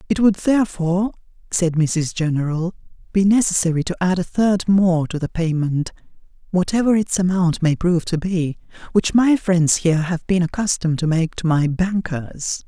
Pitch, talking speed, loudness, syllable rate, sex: 175 Hz, 165 wpm, -19 LUFS, 4.2 syllables/s, female